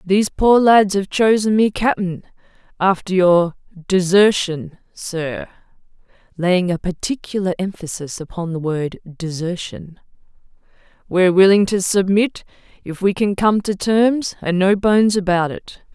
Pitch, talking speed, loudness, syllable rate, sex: 190 Hz, 125 wpm, -17 LUFS, 4.3 syllables/s, female